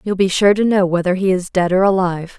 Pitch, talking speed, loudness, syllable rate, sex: 185 Hz, 275 wpm, -16 LUFS, 6.1 syllables/s, female